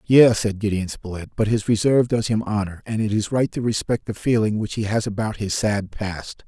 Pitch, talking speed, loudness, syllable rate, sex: 105 Hz, 230 wpm, -22 LUFS, 5.3 syllables/s, male